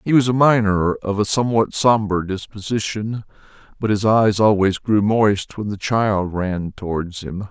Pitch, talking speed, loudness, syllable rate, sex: 105 Hz, 170 wpm, -19 LUFS, 4.4 syllables/s, male